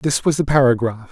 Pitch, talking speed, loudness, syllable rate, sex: 130 Hz, 215 wpm, -17 LUFS, 5.6 syllables/s, male